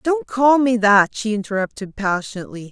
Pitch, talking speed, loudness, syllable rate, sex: 210 Hz, 155 wpm, -18 LUFS, 5.3 syllables/s, female